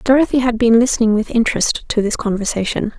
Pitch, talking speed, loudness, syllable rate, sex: 230 Hz, 180 wpm, -16 LUFS, 6.3 syllables/s, female